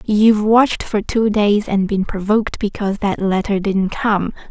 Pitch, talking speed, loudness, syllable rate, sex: 205 Hz, 175 wpm, -17 LUFS, 4.7 syllables/s, female